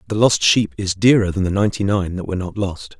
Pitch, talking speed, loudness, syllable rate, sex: 100 Hz, 240 wpm, -18 LUFS, 5.8 syllables/s, male